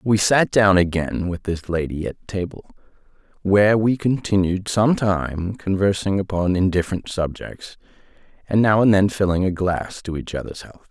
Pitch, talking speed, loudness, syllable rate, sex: 95 Hz, 160 wpm, -20 LUFS, 4.7 syllables/s, male